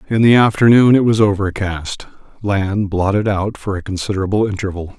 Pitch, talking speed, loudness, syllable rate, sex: 100 Hz, 155 wpm, -15 LUFS, 5.4 syllables/s, male